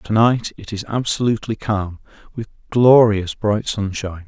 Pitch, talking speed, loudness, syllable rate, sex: 110 Hz, 140 wpm, -18 LUFS, 4.7 syllables/s, male